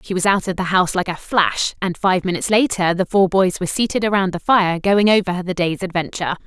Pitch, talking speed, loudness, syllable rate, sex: 185 Hz, 240 wpm, -18 LUFS, 6.0 syllables/s, female